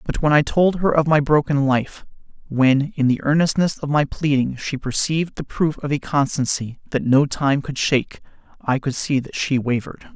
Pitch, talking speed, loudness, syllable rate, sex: 140 Hz, 195 wpm, -20 LUFS, 5.0 syllables/s, male